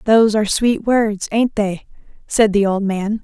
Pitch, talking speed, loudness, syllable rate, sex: 210 Hz, 185 wpm, -17 LUFS, 4.5 syllables/s, female